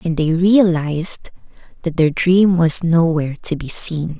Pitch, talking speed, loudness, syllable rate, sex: 165 Hz, 155 wpm, -16 LUFS, 4.3 syllables/s, female